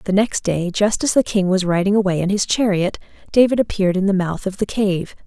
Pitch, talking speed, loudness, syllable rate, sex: 195 Hz, 240 wpm, -18 LUFS, 5.8 syllables/s, female